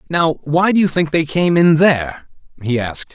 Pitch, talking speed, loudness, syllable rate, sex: 155 Hz, 210 wpm, -15 LUFS, 5.1 syllables/s, male